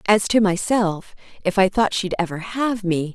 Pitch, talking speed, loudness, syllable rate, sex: 195 Hz, 190 wpm, -20 LUFS, 4.5 syllables/s, female